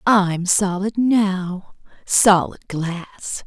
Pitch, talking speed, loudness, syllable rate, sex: 195 Hz, 85 wpm, -19 LUFS, 2.3 syllables/s, female